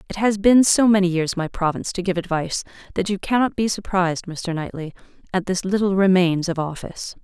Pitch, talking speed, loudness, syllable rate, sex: 185 Hz, 200 wpm, -20 LUFS, 5.9 syllables/s, female